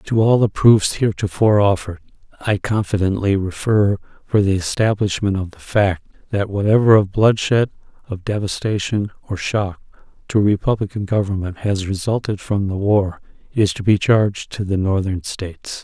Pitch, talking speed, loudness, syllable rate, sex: 100 Hz, 150 wpm, -18 LUFS, 5.0 syllables/s, male